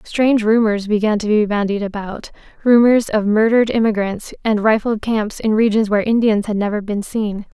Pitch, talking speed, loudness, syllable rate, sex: 215 Hz, 165 wpm, -17 LUFS, 5.3 syllables/s, female